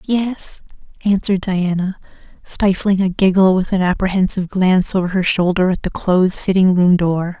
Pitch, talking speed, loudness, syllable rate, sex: 185 Hz, 155 wpm, -16 LUFS, 5.1 syllables/s, female